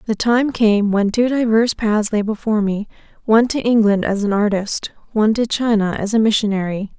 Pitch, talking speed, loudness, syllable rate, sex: 215 Hz, 180 wpm, -17 LUFS, 5.5 syllables/s, female